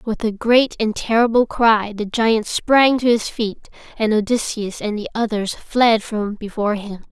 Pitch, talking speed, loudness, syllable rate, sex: 220 Hz, 175 wpm, -18 LUFS, 4.4 syllables/s, female